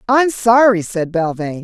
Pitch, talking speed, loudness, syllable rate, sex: 205 Hz, 145 wpm, -15 LUFS, 4.6 syllables/s, female